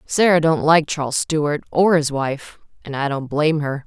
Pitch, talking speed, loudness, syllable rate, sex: 150 Hz, 185 wpm, -18 LUFS, 4.7 syllables/s, female